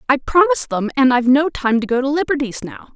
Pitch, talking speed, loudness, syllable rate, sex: 270 Hz, 245 wpm, -16 LUFS, 6.3 syllables/s, female